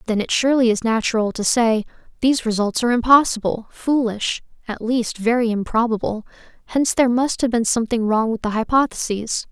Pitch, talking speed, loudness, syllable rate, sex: 230 Hz, 165 wpm, -19 LUFS, 5.8 syllables/s, female